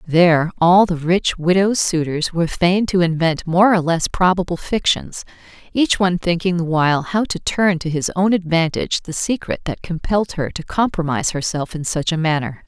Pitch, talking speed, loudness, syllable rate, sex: 175 Hz, 185 wpm, -18 LUFS, 5.1 syllables/s, female